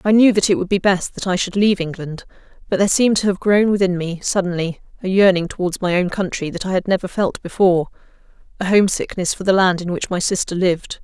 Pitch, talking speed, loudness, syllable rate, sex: 190 Hz, 235 wpm, -18 LUFS, 6.3 syllables/s, female